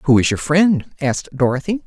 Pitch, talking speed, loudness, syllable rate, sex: 155 Hz, 195 wpm, -17 LUFS, 5.3 syllables/s, male